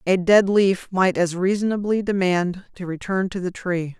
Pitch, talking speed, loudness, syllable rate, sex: 185 Hz, 180 wpm, -21 LUFS, 4.6 syllables/s, female